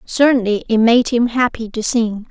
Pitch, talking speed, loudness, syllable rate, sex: 230 Hz, 180 wpm, -16 LUFS, 4.7 syllables/s, female